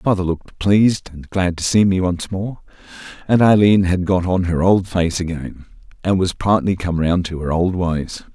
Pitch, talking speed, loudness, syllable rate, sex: 90 Hz, 200 wpm, -18 LUFS, 4.8 syllables/s, male